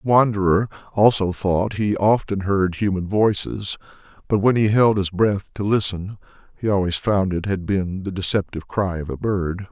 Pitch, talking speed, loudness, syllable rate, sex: 100 Hz, 180 wpm, -21 LUFS, 4.8 syllables/s, male